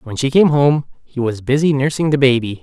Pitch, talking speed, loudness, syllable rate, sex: 135 Hz, 230 wpm, -15 LUFS, 5.5 syllables/s, male